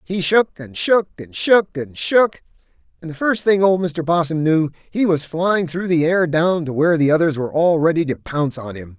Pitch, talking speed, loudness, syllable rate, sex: 165 Hz, 225 wpm, -18 LUFS, 4.9 syllables/s, male